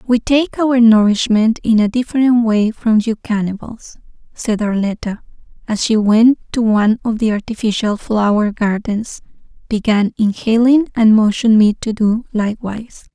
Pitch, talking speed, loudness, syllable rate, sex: 220 Hz, 140 wpm, -15 LUFS, 4.7 syllables/s, female